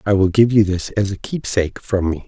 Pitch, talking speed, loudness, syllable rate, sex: 100 Hz, 265 wpm, -18 LUFS, 5.6 syllables/s, male